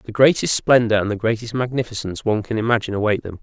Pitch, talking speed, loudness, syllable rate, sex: 110 Hz, 210 wpm, -19 LUFS, 7.3 syllables/s, male